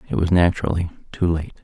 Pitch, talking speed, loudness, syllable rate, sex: 85 Hz, 185 wpm, -21 LUFS, 7.0 syllables/s, male